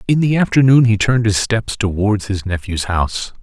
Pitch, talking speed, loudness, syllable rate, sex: 110 Hz, 190 wpm, -16 LUFS, 5.3 syllables/s, male